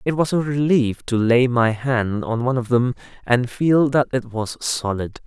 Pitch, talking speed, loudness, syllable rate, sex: 125 Hz, 205 wpm, -20 LUFS, 4.4 syllables/s, male